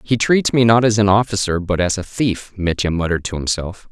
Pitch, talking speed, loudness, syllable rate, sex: 100 Hz, 230 wpm, -17 LUFS, 5.6 syllables/s, male